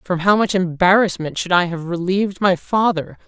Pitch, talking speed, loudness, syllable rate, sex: 185 Hz, 185 wpm, -18 LUFS, 5.1 syllables/s, female